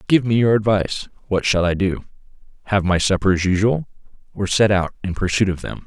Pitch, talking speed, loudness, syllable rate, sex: 100 Hz, 195 wpm, -19 LUFS, 5.8 syllables/s, male